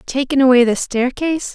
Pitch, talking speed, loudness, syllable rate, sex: 265 Hz, 155 wpm, -15 LUFS, 5.6 syllables/s, female